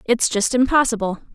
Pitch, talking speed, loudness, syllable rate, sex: 230 Hz, 135 wpm, -19 LUFS, 5.4 syllables/s, female